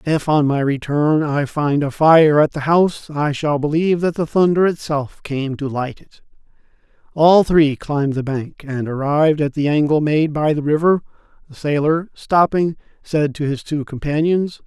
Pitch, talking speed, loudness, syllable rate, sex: 150 Hz, 180 wpm, -17 LUFS, 4.6 syllables/s, male